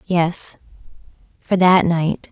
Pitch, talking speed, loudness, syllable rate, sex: 175 Hz, 105 wpm, -17 LUFS, 2.8 syllables/s, female